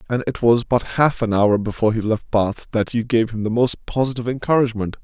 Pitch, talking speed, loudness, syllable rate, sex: 115 Hz, 225 wpm, -19 LUFS, 6.0 syllables/s, male